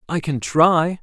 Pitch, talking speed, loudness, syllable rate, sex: 160 Hz, 175 wpm, -18 LUFS, 3.6 syllables/s, male